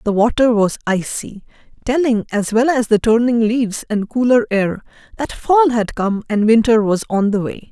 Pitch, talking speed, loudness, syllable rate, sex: 230 Hz, 185 wpm, -16 LUFS, 4.8 syllables/s, female